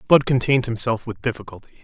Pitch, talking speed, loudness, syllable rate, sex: 120 Hz, 165 wpm, -21 LUFS, 6.9 syllables/s, male